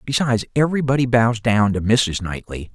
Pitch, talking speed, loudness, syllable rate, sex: 115 Hz, 155 wpm, -19 LUFS, 5.5 syllables/s, male